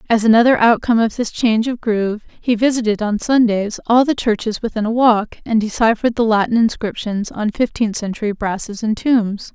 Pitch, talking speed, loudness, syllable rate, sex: 220 Hz, 180 wpm, -17 LUFS, 5.5 syllables/s, female